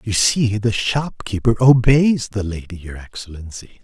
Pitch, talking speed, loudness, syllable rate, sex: 110 Hz, 140 wpm, -17 LUFS, 4.5 syllables/s, male